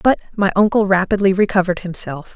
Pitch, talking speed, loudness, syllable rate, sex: 190 Hz, 155 wpm, -17 LUFS, 6.3 syllables/s, female